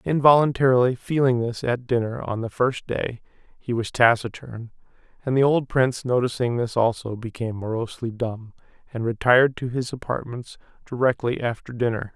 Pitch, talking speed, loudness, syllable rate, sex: 120 Hz, 150 wpm, -23 LUFS, 5.3 syllables/s, male